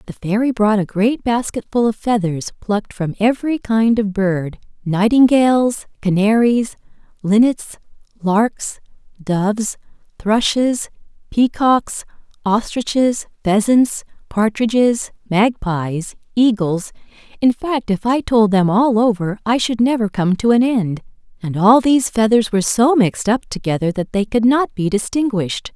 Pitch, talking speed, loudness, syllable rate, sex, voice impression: 220 Hz, 130 wpm, -17 LUFS, 4.3 syllables/s, female, feminine, adult-like, tensed, powerful, bright, soft, fluent, friendly, reassuring, elegant, slightly kind, slightly intense